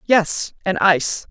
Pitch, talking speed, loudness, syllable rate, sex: 180 Hz, 140 wpm, -18 LUFS, 3.9 syllables/s, female